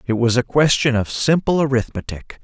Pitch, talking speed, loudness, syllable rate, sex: 130 Hz, 170 wpm, -18 LUFS, 5.3 syllables/s, male